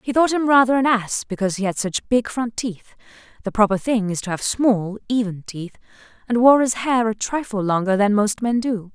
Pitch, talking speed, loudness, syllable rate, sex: 220 Hz, 220 wpm, -20 LUFS, 4.1 syllables/s, female